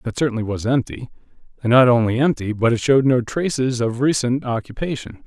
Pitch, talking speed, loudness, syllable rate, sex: 120 Hz, 170 wpm, -19 LUFS, 5.8 syllables/s, male